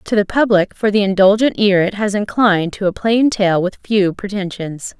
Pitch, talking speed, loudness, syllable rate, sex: 200 Hz, 205 wpm, -16 LUFS, 4.9 syllables/s, female